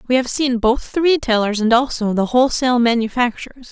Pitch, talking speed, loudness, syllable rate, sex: 245 Hz, 175 wpm, -17 LUFS, 5.9 syllables/s, female